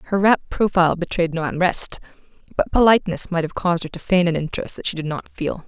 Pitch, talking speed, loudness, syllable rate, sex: 175 Hz, 220 wpm, -20 LUFS, 6.4 syllables/s, female